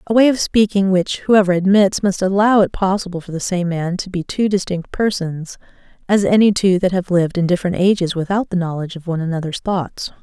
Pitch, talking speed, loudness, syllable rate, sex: 185 Hz, 210 wpm, -17 LUFS, 5.8 syllables/s, female